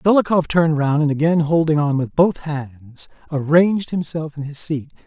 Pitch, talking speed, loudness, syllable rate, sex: 155 Hz, 180 wpm, -19 LUFS, 5.0 syllables/s, male